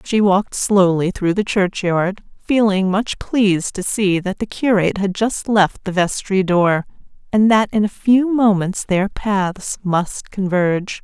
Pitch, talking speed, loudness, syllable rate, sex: 195 Hz, 165 wpm, -17 LUFS, 4.0 syllables/s, female